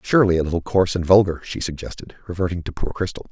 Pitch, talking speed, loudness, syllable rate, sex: 90 Hz, 215 wpm, -20 LUFS, 7.2 syllables/s, male